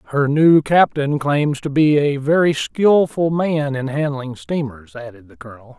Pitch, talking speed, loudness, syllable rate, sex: 145 Hz, 165 wpm, -17 LUFS, 4.3 syllables/s, male